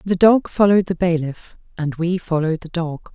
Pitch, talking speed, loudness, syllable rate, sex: 175 Hz, 190 wpm, -19 LUFS, 5.3 syllables/s, female